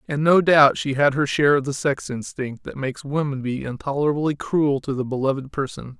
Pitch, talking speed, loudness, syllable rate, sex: 140 Hz, 210 wpm, -21 LUFS, 5.5 syllables/s, male